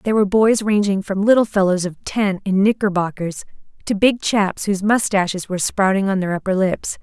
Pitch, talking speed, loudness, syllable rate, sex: 200 Hz, 190 wpm, -18 LUFS, 5.5 syllables/s, female